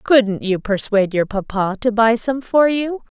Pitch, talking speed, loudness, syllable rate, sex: 225 Hz, 190 wpm, -18 LUFS, 4.4 syllables/s, female